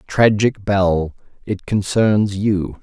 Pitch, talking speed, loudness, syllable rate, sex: 100 Hz, 105 wpm, -18 LUFS, 2.9 syllables/s, male